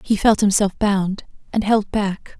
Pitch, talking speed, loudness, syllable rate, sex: 205 Hz, 175 wpm, -19 LUFS, 3.9 syllables/s, female